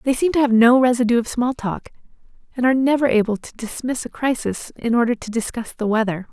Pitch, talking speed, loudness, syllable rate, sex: 240 Hz, 220 wpm, -19 LUFS, 6.1 syllables/s, female